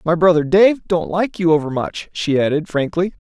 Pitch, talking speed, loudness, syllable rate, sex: 170 Hz, 185 wpm, -17 LUFS, 5.0 syllables/s, male